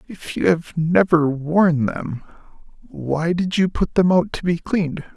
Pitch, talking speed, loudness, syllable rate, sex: 165 Hz, 175 wpm, -19 LUFS, 3.9 syllables/s, male